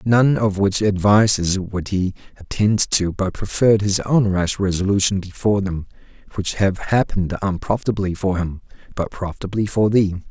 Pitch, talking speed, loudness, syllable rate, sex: 100 Hz, 150 wpm, -19 LUFS, 5.0 syllables/s, male